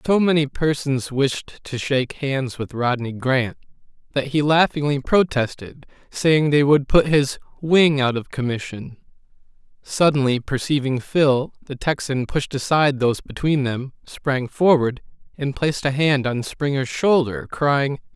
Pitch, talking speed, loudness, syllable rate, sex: 140 Hz, 140 wpm, -20 LUFS, 4.3 syllables/s, male